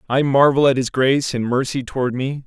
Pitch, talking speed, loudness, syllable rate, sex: 130 Hz, 220 wpm, -18 LUFS, 5.7 syllables/s, male